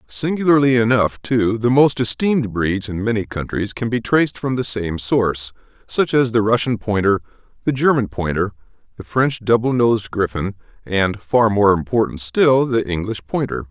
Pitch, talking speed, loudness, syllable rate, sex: 115 Hz, 165 wpm, -18 LUFS, 4.9 syllables/s, male